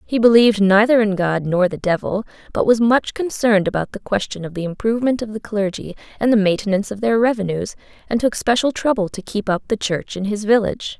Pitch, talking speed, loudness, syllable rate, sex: 210 Hz, 215 wpm, -18 LUFS, 6.0 syllables/s, female